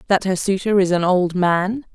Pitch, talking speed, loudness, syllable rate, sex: 190 Hz, 215 wpm, -18 LUFS, 4.7 syllables/s, female